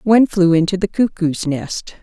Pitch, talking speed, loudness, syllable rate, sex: 185 Hz, 175 wpm, -16 LUFS, 4.9 syllables/s, female